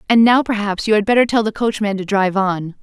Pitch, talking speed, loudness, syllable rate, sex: 210 Hz, 255 wpm, -16 LUFS, 6.1 syllables/s, female